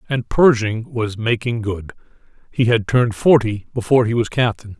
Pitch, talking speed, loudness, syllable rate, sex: 115 Hz, 165 wpm, -18 LUFS, 5.1 syllables/s, male